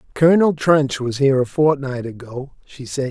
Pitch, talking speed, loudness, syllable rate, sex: 140 Hz, 175 wpm, -18 LUFS, 5.0 syllables/s, male